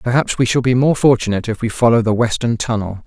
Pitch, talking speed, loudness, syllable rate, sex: 120 Hz, 235 wpm, -16 LUFS, 6.4 syllables/s, male